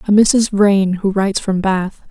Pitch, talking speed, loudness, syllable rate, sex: 200 Hz, 200 wpm, -15 LUFS, 4.2 syllables/s, female